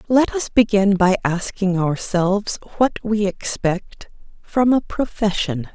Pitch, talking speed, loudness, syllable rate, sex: 205 Hz, 125 wpm, -19 LUFS, 3.9 syllables/s, female